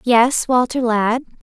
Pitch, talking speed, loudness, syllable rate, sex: 240 Hz, 115 wpm, -17 LUFS, 3.4 syllables/s, female